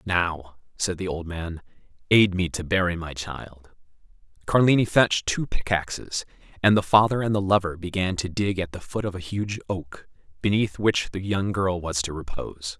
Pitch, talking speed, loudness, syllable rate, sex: 90 Hz, 185 wpm, -24 LUFS, 4.9 syllables/s, male